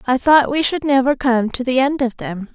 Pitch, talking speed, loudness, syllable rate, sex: 260 Hz, 260 wpm, -16 LUFS, 5.0 syllables/s, female